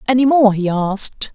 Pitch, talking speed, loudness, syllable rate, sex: 225 Hz, 180 wpm, -15 LUFS, 5.1 syllables/s, female